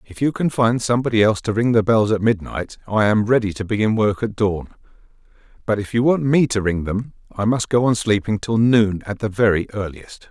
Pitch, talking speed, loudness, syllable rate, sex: 110 Hz, 225 wpm, -19 LUFS, 5.5 syllables/s, male